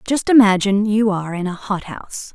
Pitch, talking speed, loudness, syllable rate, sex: 205 Hz, 180 wpm, -17 LUFS, 5.9 syllables/s, female